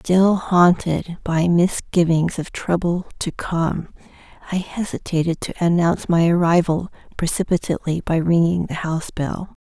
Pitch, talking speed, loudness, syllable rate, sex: 170 Hz, 125 wpm, -20 LUFS, 4.5 syllables/s, female